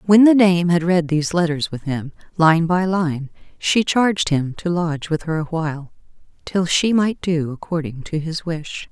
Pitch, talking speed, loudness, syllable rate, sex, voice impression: 165 Hz, 190 wpm, -19 LUFS, 4.7 syllables/s, female, very feminine, very adult-like, slightly middle-aged, thin, slightly tensed, slightly weak, slightly dark, very soft, clear, fluent, cute, slightly cool, very intellectual, refreshing, sincere, very calm, very friendly, very reassuring, unique, very elegant, very sweet, slightly lively, very kind, slightly modest